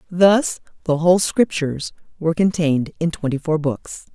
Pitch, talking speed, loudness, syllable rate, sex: 165 Hz, 145 wpm, -19 LUFS, 5.2 syllables/s, female